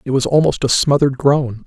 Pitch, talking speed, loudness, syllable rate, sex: 135 Hz, 215 wpm, -15 LUFS, 5.7 syllables/s, male